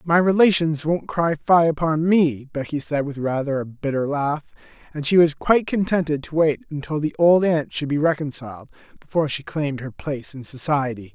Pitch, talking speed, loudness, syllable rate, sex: 150 Hz, 190 wpm, -21 LUFS, 5.3 syllables/s, male